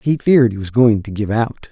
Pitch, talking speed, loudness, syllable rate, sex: 115 Hz, 280 wpm, -16 LUFS, 5.6 syllables/s, male